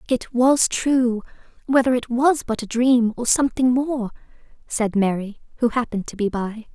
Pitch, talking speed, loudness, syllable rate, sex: 240 Hz, 170 wpm, -20 LUFS, 4.8 syllables/s, female